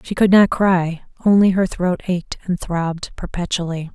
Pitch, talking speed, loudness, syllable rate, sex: 180 Hz, 165 wpm, -18 LUFS, 4.7 syllables/s, female